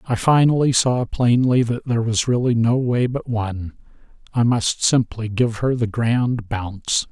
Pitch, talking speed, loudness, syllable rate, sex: 120 Hz, 160 wpm, -19 LUFS, 4.3 syllables/s, male